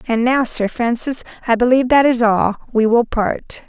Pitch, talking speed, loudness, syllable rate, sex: 240 Hz, 195 wpm, -16 LUFS, 4.8 syllables/s, female